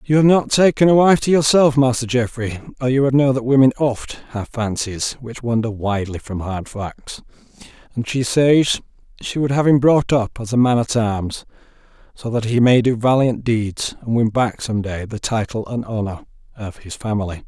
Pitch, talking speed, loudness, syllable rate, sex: 120 Hz, 200 wpm, -18 LUFS, 4.8 syllables/s, male